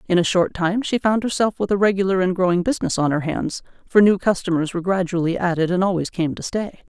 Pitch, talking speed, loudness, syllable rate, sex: 185 Hz, 235 wpm, -20 LUFS, 6.2 syllables/s, female